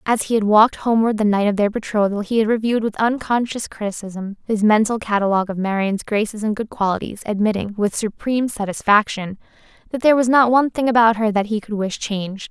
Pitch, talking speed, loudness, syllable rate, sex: 215 Hz, 200 wpm, -19 LUFS, 6.1 syllables/s, female